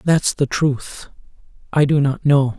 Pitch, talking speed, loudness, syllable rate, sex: 140 Hz, 140 wpm, -18 LUFS, 3.7 syllables/s, male